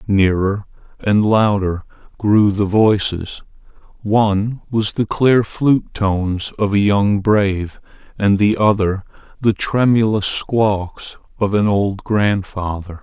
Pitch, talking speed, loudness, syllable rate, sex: 100 Hz, 115 wpm, -17 LUFS, 3.6 syllables/s, male